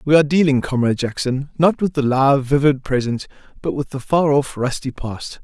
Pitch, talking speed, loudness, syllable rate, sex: 140 Hz, 200 wpm, -18 LUFS, 5.3 syllables/s, male